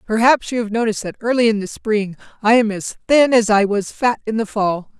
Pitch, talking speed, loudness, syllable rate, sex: 220 Hz, 240 wpm, -17 LUFS, 5.6 syllables/s, female